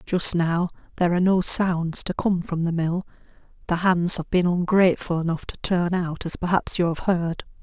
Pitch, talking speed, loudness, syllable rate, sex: 175 Hz, 195 wpm, -22 LUFS, 5.0 syllables/s, female